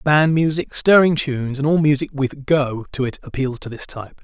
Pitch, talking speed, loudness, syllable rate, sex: 140 Hz, 210 wpm, -19 LUFS, 5.1 syllables/s, male